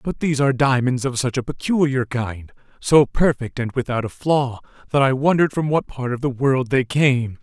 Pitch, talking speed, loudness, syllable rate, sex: 130 Hz, 210 wpm, -20 LUFS, 5.2 syllables/s, male